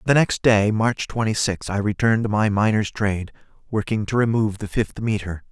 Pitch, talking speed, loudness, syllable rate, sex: 105 Hz, 195 wpm, -21 LUFS, 5.5 syllables/s, male